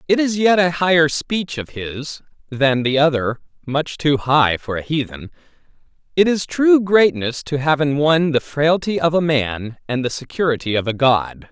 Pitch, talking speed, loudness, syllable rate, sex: 150 Hz, 190 wpm, -18 LUFS, 4.2 syllables/s, male